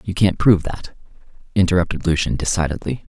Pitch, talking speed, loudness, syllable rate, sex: 90 Hz, 135 wpm, -19 LUFS, 6.3 syllables/s, male